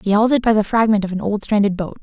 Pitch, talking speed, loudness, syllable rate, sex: 210 Hz, 295 wpm, -17 LUFS, 6.8 syllables/s, female